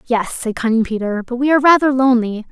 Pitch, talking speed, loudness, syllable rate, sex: 245 Hz, 215 wpm, -15 LUFS, 6.5 syllables/s, female